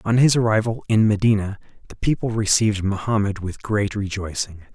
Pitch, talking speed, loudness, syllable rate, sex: 105 Hz, 150 wpm, -21 LUFS, 5.5 syllables/s, male